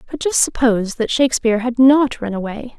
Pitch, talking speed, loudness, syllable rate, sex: 240 Hz, 195 wpm, -16 LUFS, 5.8 syllables/s, female